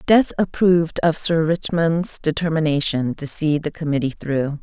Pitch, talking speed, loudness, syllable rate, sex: 160 Hz, 145 wpm, -20 LUFS, 4.6 syllables/s, female